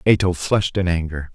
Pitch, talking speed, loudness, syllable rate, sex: 90 Hz, 180 wpm, -20 LUFS, 5.8 syllables/s, male